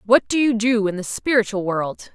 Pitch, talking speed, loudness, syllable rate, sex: 215 Hz, 225 wpm, -20 LUFS, 4.9 syllables/s, female